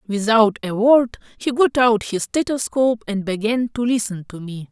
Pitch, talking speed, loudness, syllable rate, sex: 220 Hz, 180 wpm, -19 LUFS, 4.7 syllables/s, female